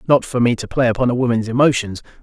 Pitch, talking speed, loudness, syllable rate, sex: 120 Hz, 240 wpm, -17 LUFS, 6.8 syllables/s, male